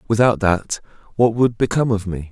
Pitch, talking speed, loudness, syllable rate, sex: 110 Hz, 180 wpm, -19 LUFS, 5.6 syllables/s, male